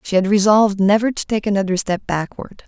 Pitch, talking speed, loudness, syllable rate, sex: 200 Hz, 200 wpm, -17 LUFS, 6.0 syllables/s, female